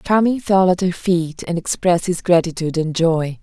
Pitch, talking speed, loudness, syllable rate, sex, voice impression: 175 Hz, 190 wpm, -18 LUFS, 5.0 syllables/s, female, very feminine, very adult-like, slightly thin, slightly relaxed, slightly weak, bright, very clear, fluent, slightly raspy, slightly cute, cool, very intellectual, refreshing, sincere, calm, very friendly, very reassuring, unique, very elegant, sweet, lively, very kind, slightly intense, slightly modest, slightly light